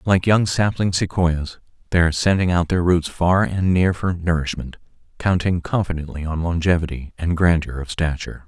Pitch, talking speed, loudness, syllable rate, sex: 85 Hz, 165 wpm, -20 LUFS, 5.1 syllables/s, male